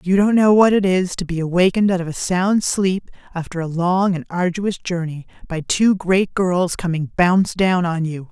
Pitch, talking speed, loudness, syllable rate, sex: 180 Hz, 210 wpm, -18 LUFS, 4.8 syllables/s, female